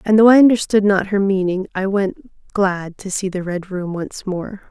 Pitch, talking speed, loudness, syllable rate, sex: 195 Hz, 215 wpm, -17 LUFS, 4.7 syllables/s, female